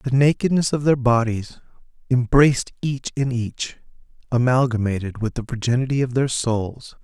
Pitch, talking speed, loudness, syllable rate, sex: 125 Hz, 135 wpm, -21 LUFS, 4.8 syllables/s, male